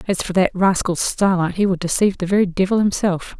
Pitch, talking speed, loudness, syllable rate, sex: 190 Hz, 210 wpm, -18 LUFS, 5.9 syllables/s, female